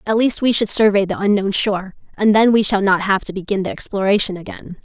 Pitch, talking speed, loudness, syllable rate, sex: 200 Hz, 235 wpm, -17 LUFS, 6.0 syllables/s, female